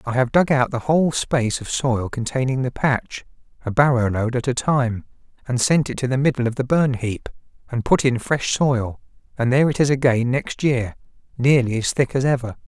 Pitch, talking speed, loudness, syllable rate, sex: 130 Hz, 210 wpm, -20 LUFS, 5.2 syllables/s, male